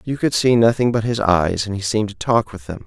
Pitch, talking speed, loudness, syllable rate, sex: 105 Hz, 295 wpm, -18 LUFS, 5.8 syllables/s, male